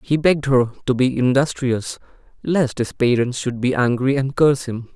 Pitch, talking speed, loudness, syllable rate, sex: 130 Hz, 180 wpm, -19 LUFS, 5.0 syllables/s, male